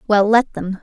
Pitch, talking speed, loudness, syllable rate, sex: 205 Hz, 220 wpm, -16 LUFS, 4.6 syllables/s, female